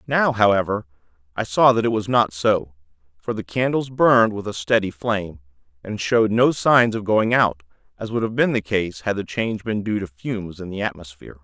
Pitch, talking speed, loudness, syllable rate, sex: 105 Hz, 210 wpm, -20 LUFS, 5.4 syllables/s, male